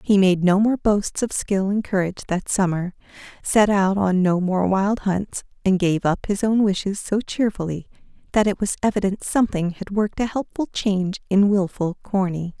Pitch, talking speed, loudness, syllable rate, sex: 195 Hz, 185 wpm, -21 LUFS, 4.9 syllables/s, female